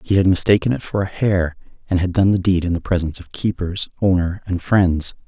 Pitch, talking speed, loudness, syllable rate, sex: 90 Hz, 225 wpm, -19 LUFS, 5.6 syllables/s, male